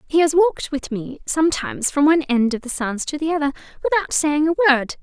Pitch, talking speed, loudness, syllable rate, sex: 285 Hz, 225 wpm, -19 LUFS, 6.3 syllables/s, female